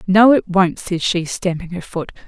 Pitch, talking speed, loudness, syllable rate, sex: 185 Hz, 210 wpm, -17 LUFS, 4.5 syllables/s, female